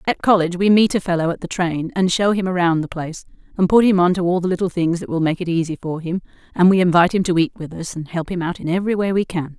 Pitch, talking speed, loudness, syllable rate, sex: 180 Hz, 295 wpm, -18 LUFS, 6.8 syllables/s, female